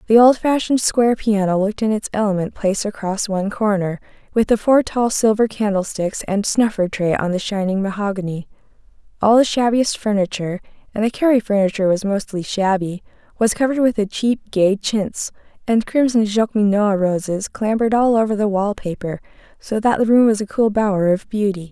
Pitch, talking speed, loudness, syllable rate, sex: 210 Hz, 175 wpm, -18 LUFS, 5.6 syllables/s, female